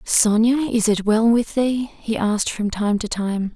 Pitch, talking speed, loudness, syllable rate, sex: 220 Hz, 205 wpm, -20 LUFS, 4.1 syllables/s, female